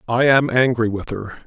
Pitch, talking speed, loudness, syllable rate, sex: 120 Hz, 205 wpm, -17 LUFS, 5.0 syllables/s, male